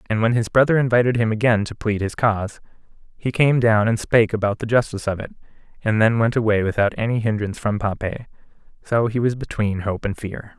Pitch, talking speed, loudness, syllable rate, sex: 110 Hz, 210 wpm, -20 LUFS, 5.9 syllables/s, male